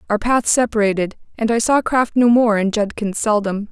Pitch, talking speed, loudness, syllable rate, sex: 220 Hz, 195 wpm, -17 LUFS, 5.1 syllables/s, female